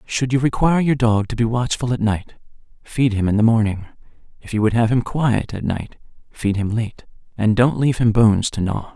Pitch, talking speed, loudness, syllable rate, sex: 115 Hz, 220 wpm, -19 LUFS, 5.4 syllables/s, male